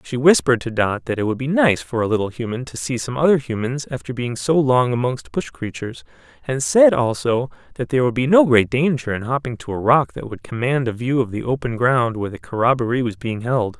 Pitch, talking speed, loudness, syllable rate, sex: 125 Hz, 240 wpm, -19 LUFS, 5.8 syllables/s, male